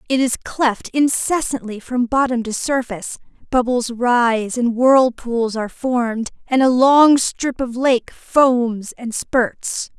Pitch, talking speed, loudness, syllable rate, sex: 245 Hz, 140 wpm, -18 LUFS, 3.6 syllables/s, female